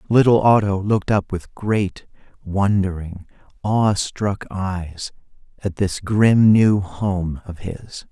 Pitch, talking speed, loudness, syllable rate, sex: 100 Hz, 125 wpm, -19 LUFS, 3.3 syllables/s, male